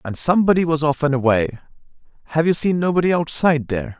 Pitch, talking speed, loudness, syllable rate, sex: 150 Hz, 165 wpm, -18 LUFS, 6.9 syllables/s, male